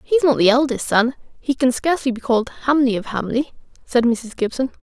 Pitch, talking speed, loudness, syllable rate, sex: 255 Hz, 200 wpm, -19 LUFS, 5.6 syllables/s, female